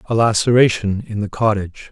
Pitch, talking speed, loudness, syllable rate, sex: 105 Hz, 155 wpm, -17 LUFS, 5.6 syllables/s, male